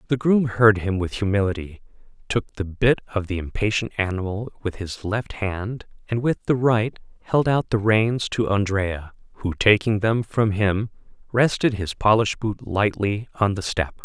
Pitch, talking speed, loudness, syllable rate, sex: 105 Hz, 170 wpm, -22 LUFS, 4.5 syllables/s, male